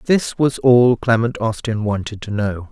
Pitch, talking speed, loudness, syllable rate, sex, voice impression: 115 Hz, 175 wpm, -17 LUFS, 4.3 syllables/s, male, masculine, adult-like, sincere, friendly, slightly kind